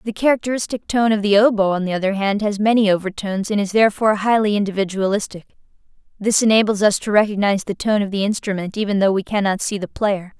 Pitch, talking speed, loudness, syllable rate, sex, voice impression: 205 Hz, 200 wpm, -18 LUFS, 6.6 syllables/s, female, feminine, slightly young, tensed, fluent, intellectual, slightly sharp